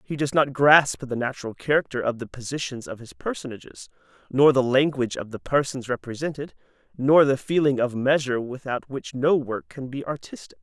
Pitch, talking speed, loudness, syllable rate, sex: 130 Hz, 180 wpm, -23 LUFS, 5.5 syllables/s, male